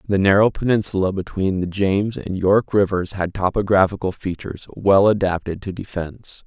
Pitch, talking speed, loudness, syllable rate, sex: 95 Hz, 150 wpm, -20 LUFS, 5.3 syllables/s, male